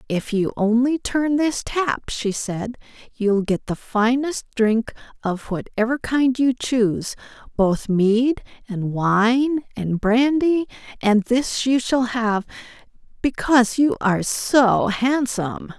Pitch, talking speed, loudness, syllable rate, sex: 235 Hz, 130 wpm, -20 LUFS, 3.5 syllables/s, female